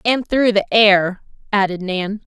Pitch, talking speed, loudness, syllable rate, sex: 205 Hz, 155 wpm, -16 LUFS, 4.0 syllables/s, female